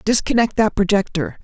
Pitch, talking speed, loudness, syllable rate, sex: 200 Hz, 125 wpm, -18 LUFS, 5.3 syllables/s, female